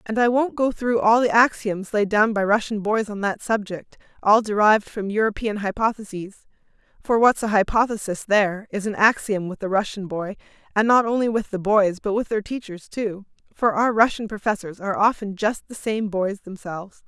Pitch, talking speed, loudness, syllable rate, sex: 210 Hz, 195 wpm, -21 LUFS, 5.3 syllables/s, female